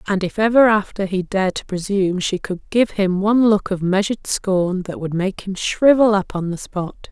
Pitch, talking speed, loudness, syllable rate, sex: 195 Hz, 220 wpm, -19 LUFS, 5.1 syllables/s, female